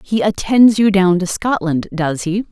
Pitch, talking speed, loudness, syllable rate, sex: 190 Hz, 165 wpm, -15 LUFS, 4.3 syllables/s, female